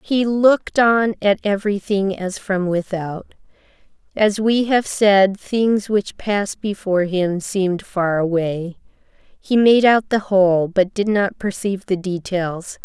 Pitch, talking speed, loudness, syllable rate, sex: 195 Hz, 145 wpm, -18 LUFS, 4.0 syllables/s, female